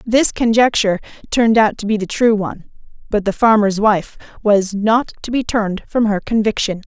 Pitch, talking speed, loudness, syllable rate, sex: 215 Hz, 180 wpm, -16 LUFS, 5.3 syllables/s, female